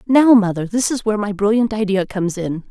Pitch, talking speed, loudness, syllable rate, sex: 210 Hz, 220 wpm, -17 LUFS, 6.0 syllables/s, female